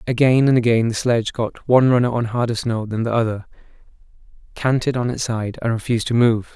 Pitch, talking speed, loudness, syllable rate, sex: 120 Hz, 200 wpm, -19 LUFS, 6.0 syllables/s, male